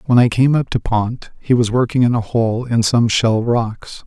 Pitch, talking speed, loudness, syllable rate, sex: 120 Hz, 235 wpm, -16 LUFS, 4.4 syllables/s, male